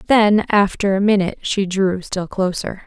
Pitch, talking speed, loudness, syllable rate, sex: 195 Hz, 170 wpm, -18 LUFS, 4.3 syllables/s, female